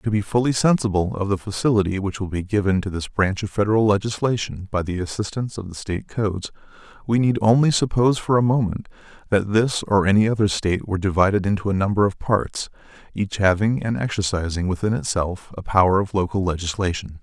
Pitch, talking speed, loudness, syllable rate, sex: 100 Hz, 190 wpm, -21 LUFS, 6.1 syllables/s, male